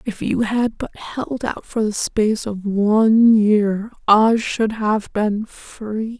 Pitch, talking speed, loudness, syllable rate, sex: 215 Hz, 165 wpm, -18 LUFS, 3.3 syllables/s, female